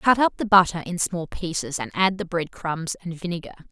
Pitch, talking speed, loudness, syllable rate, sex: 175 Hz, 225 wpm, -23 LUFS, 5.4 syllables/s, female